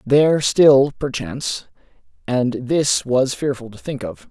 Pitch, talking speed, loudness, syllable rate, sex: 125 Hz, 140 wpm, -18 LUFS, 3.9 syllables/s, male